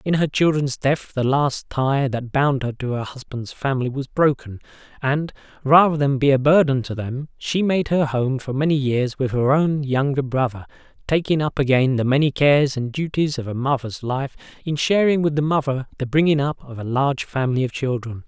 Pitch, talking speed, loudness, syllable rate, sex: 135 Hz, 205 wpm, -20 LUFS, 5.2 syllables/s, male